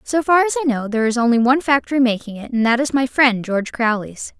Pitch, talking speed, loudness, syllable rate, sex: 250 Hz, 260 wpm, -17 LUFS, 6.4 syllables/s, female